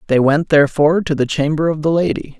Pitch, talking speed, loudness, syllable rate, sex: 155 Hz, 225 wpm, -15 LUFS, 6.4 syllables/s, male